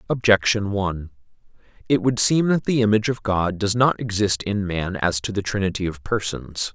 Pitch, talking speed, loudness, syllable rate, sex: 105 Hz, 185 wpm, -21 LUFS, 5.2 syllables/s, male